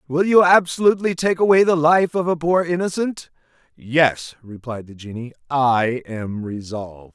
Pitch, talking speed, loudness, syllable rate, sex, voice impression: 145 Hz, 150 wpm, -18 LUFS, 4.6 syllables/s, male, masculine, adult-like, tensed, powerful, clear, fluent, cool, intellectual, calm, mature, reassuring, wild, slightly strict, slightly modest